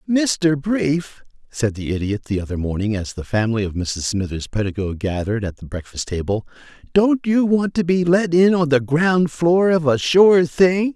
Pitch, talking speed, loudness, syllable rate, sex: 140 Hz, 190 wpm, -19 LUFS, 4.7 syllables/s, male